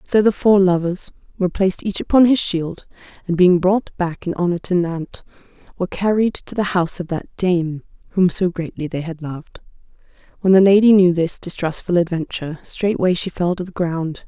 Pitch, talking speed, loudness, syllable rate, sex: 180 Hz, 190 wpm, -18 LUFS, 5.4 syllables/s, female